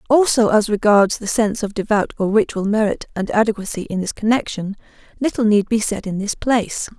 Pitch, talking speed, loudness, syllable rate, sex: 215 Hz, 190 wpm, -18 LUFS, 5.7 syllables/s, female